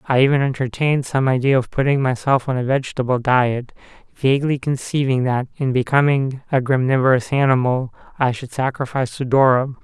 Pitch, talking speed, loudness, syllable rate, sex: 130 Hz, 150 wpm, -19 LUFS, 5.8 syllables/s, male